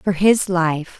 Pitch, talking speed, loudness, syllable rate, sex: 180 Hz, 180 wpm, -17 LUFS, 3.2 syllables/s, female